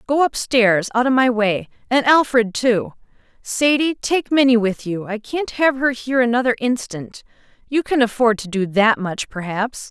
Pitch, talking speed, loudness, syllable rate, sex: 235 Hz, 180 wpm, -18 LUFS, 4.6 syllables/s, female